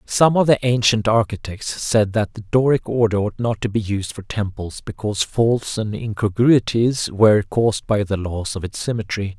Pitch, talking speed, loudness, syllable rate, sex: 110 Hz, 185 wpm, -19 LUFS, 4.8 syllables/s, male